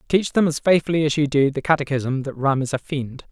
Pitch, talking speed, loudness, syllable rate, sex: 145 Hz, 255 wpm, -21 LUFS, 5.7 syllables/s, male